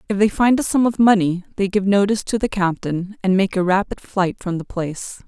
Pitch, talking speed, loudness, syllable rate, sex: 195 Hz, 240 wpm, -19 LUFS, 5.6 syllables/s, female